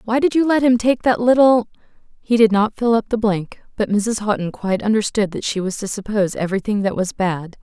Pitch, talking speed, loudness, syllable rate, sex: 215 Hz, 230 wpm, -18 LUFS, 5.7 syllables/s, female